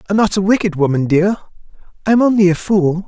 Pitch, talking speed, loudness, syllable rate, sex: 190 Hz, 195 wpm, -14 LUFS, 6.0 syllables/s, male